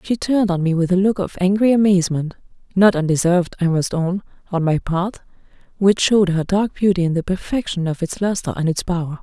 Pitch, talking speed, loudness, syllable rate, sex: 185 Hz, 195 wpm, -18 LUFS, 5.9 syllables/s, female